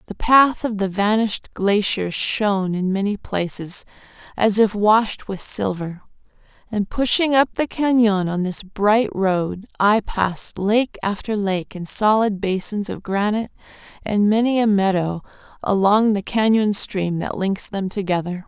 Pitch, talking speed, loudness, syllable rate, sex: 205 Hz, 150 wpm, -20 LUFS, 4.2 syllables/s, female